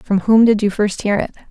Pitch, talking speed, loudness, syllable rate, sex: 205 Hz, 280 wpm, -15 LUFS, 5.3 syllables/s, female